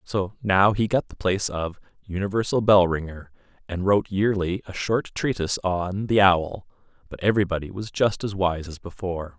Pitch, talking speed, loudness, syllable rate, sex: 95 Hz, 175 wpm, -23 LUFS, 5.2 syllables/s, male